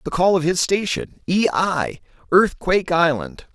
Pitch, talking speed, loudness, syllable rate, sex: 170 Hz, 120 wpm, -19 LUFS, 4.7 syllables/s, male